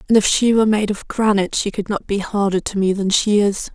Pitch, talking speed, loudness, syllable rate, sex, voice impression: 205 Hz, 275 wpm, -18 LUFS, 5.9 syllables/s, female, feminine, slightly young, slightly adult-like, relaxed, weak, slightly soft, slightly muffled, slightly intellectual, reassuring, kind, modest